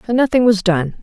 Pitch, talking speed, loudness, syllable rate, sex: 210 Hz, 235 wpm, -15 LUFS, 5.7 syllables/s, female